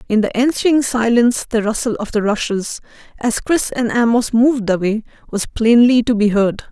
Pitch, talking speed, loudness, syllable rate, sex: 230 Hz, 180 wpm, -16 LUFS, 5.0 syllables/s, female